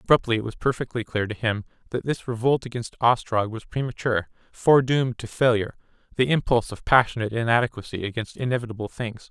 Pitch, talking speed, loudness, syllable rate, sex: 115 Hz, 160 wpm, -24 LUFS, 6.6 syllables/s, male